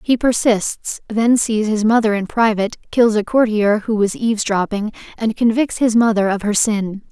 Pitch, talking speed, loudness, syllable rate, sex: 220 Hz, 175 wpm, -17 LUFS, 4.8 syllables/s, female